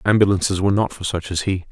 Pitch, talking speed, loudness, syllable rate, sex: 95 Hz, 245 wpm, -20 LUFS, 6.9 syllables/s, male